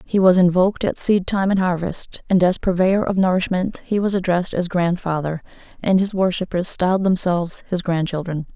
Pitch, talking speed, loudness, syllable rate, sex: 180 Hz, 175 wpm, -19 LUFS, 5.3 syllables/s, female